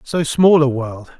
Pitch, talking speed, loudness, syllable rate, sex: 140 Hz, 200 wpm, -15 LUFS, 3.8 syllables/s, male